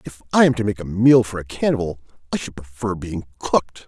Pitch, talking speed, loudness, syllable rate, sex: 100 Hz, 230 wpm, -20 LUFS, 5.8 syllables/s, male